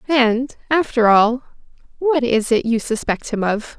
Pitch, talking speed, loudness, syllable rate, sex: 240 Hz, 160 wpm, -18 LUFS, 4.0 syllables/s, female